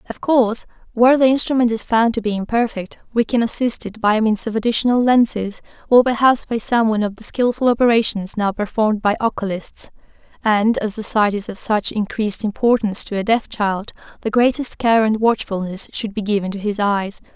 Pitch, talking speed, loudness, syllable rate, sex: 220 Hz, 195 wpm, -18 LUFS, 5.6 syllables/s, female